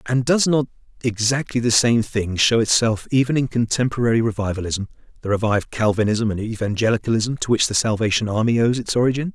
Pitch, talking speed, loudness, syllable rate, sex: 115 Hz, 160 wpm, -20 LUFS, 6.0 syllables/s, male